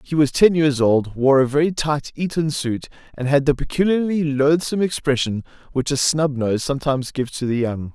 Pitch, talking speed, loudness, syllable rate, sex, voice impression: 140 Hz, 195 wpm, -20 LUFS, 5.4 syllables/s, male, masculine, adult-like, slightly thick, powerful, fluent, raspy, sincere, calm, friendly, slightly unique, wild, lively, slightly strict